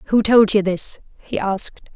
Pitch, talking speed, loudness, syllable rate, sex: 205 Hz, 185 wpm, -18 LUFS, 4.4 syllables/s, female